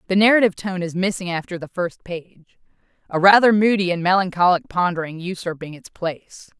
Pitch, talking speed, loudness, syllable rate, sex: 180 Hz, 165 wpm, -19 LUFS, 5.7 syllables/s, female